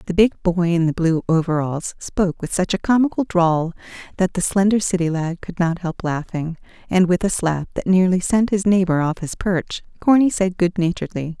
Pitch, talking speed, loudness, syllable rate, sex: 180 Hz, 200 wpm, -19 LUFS, 5.1 syllables/s, female